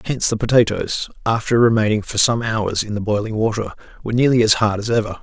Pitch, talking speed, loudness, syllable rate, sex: 110 Hz, 205 wpm, -18 LUFS, 6.2 syllables/s, male